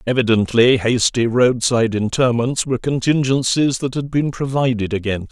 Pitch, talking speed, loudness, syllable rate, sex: 125 Hz, 125 wpm, -17 LUFS, 5.0 syllables/s, male